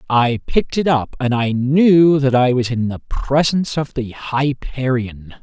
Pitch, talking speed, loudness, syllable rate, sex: 130 Hz, 175 wpm, -17 LUFS, 4.1 syllables/s, male